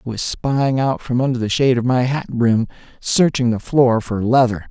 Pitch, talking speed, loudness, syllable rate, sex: 125 Hz, 215 wpm, -17 LUFS, 5.0 syllables/s, male